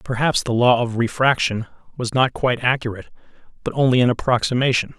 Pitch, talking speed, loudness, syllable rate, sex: 125 Hz, 155 wpm, -19 LUFS, 6.2 syllables/s, male